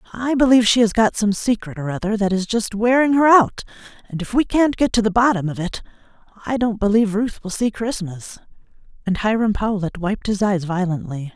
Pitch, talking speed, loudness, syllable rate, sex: 210 Hz, 205 wpm, -19 LUFS, 5.6 syllables/s, female